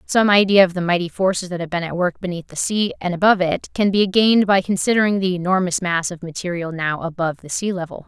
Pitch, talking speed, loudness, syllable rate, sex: 180 Hz, 230 wpm, -19 LUFS, 6.2 syllables/s, female